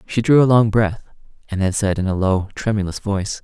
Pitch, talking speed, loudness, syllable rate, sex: 105 Hz, 225 wpm, -18 LUFS, 5.7 syllables/s, male